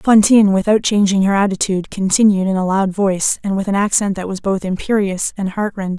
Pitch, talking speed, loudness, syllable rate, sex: 195 Hz, 210 wpm, -16 LUFS, 5.9 syllables/s, female